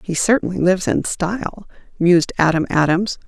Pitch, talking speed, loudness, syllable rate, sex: 180 Hz, 145 wpm, -18 LUFS, 5.4 syllables/s, female